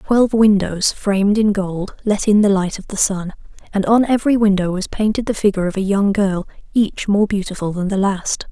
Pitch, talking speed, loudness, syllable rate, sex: 200 Hz, 210 wpm, -17 LUFS, 5.4 syllables/s, female